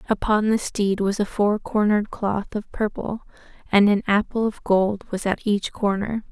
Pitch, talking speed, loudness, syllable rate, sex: 205 Hz, 180 wpm, -22 LUFS, 4.5 syllables/s, female